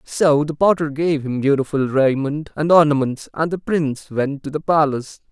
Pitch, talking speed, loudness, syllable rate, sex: 145 Hz, 180 wpm, -19 LUFS, 5.0 syllables/s, male